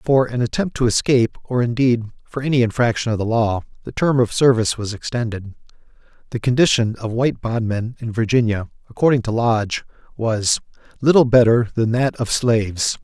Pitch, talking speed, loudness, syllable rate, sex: 115 Hz, 165 wpm, -19 LUFS, 5.5 syllables/s, male